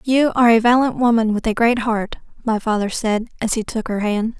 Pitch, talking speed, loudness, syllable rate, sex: 225 Hz, 230 wpm, -18 LUFS, 5.5 syllables/s, female